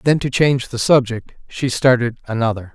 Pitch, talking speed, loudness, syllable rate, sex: 125 Hz, 175 wpm, -17 LUFS, 5.5 syllables/s, male